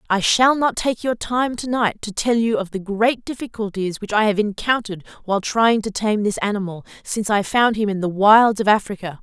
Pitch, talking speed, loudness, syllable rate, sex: 215 Hz, 215 wpm, -19 LUFS, 5.3 syllables/s, female